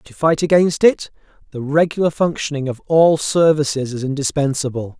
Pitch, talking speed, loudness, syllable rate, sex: 150 Hz, 145 wpm, -17 LUFS, 5.2 syllables/s, male